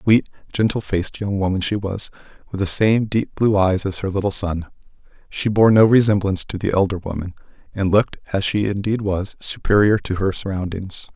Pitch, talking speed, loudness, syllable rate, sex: 100 Hz, 195 wpm, -19 LUFS, 5.5 syllables/s, male